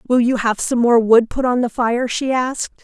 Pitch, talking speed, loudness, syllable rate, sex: 240 Hz, 255 wpm, -17 LUFS, 4.9 syllables/s, female